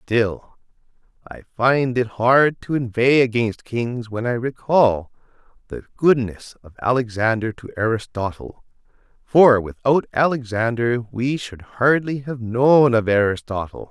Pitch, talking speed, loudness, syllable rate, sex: 120 Hz, 120 wpm, -19 LUFS, 4.0 syllables/s, male